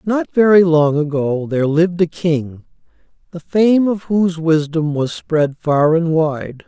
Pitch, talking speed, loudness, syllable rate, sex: 165 Hz, 160 wpm, -16 LUFS, 4.1 syllables/s, male